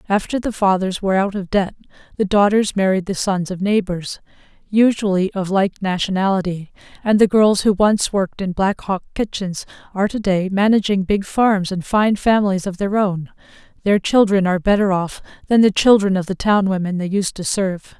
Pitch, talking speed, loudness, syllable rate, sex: 195 Hz, 180 wpm, -18 LUFS, 5.3 syllables/s, female